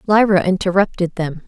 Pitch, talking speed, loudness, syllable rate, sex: 185 Hz, 120 wpm, -17 LUFS, 5.3 syllables/s, female